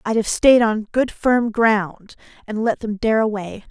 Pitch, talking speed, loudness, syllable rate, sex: 220 Hz, 195 wpm, -18 LUFS, 4.1 syllables/s, female